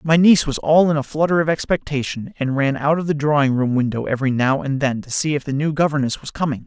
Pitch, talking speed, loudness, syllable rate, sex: 145 Hz, 260 wpm, -19 LUFS, 6.3 syllables/s, male